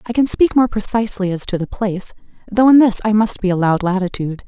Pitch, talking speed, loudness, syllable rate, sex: 205 Hz, 230 wpm, -16 LUFS, 6.7 syllables/s, female